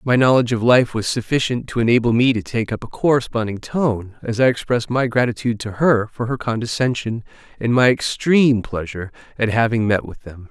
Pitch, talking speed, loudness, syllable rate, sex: 115 Hz, 195 wpm, -19 LUFS, 5.7 syllables/s, male